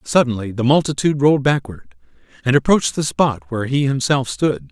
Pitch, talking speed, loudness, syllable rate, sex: 130 Hz, 165 wpm, -18 LUFS, 5.8 syllables/s, male